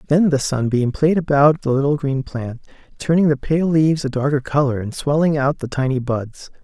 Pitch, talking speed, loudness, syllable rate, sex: 140 Hz, 200 wpm, -18 LUFS, 5.2 syllables/s, male